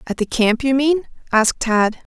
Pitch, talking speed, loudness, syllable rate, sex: 250 Hz, 190 wpm, -18 LUFS, 4.6 syllables/s, female